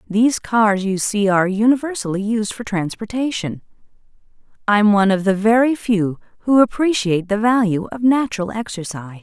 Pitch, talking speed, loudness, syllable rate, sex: 210 Hz, 150 wpm, -18 LUFS, 5.6 syllables/s, female